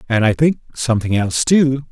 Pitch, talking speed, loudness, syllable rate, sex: 125 Hz, 190 wpm, -16 LUFS, 5.8 syllables/s, male